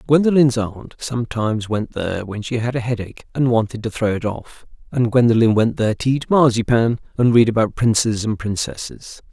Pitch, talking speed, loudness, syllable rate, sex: 115 Hz, 185 wpm, -18 LUFS, 5.5 syllables/s, male